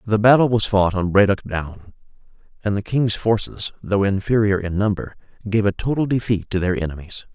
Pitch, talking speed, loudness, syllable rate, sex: 105 Hz, 180 wpm, -20 LUFS, 5.5 syllables/s, male